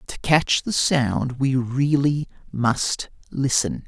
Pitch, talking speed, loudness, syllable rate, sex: 135 Hz, 125 wpm, -22 LUFS, 3.0 syllables/s, male